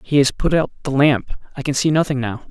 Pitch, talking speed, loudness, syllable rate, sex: 140 Hz, 265 wpm, -18 LUFS, 5.9 syllables/s, male